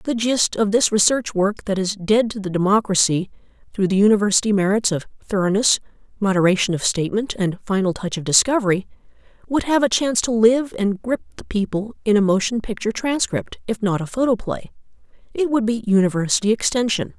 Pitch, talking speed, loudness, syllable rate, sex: 210 Hz, 175 wpm, -19 LUFS, 5.8 syllables/s, female